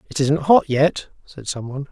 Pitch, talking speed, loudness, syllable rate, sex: 145 Hz, 190 wpm, -19 LUFS, 5.2 syllables/s, male